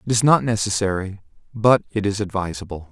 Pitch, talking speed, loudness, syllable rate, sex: 105 Hz, 165 wpm, -20 LUFS, 5.9 syllables/s, male